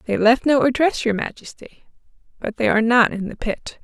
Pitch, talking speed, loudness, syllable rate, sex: 240 Hz, 205 wpm, -19 LUFS, 5.4 syllables/s, female